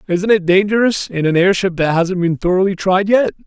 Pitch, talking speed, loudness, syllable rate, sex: 185 Hz, 190 wpm, -15 LUFS, 5.4 syllables/s, male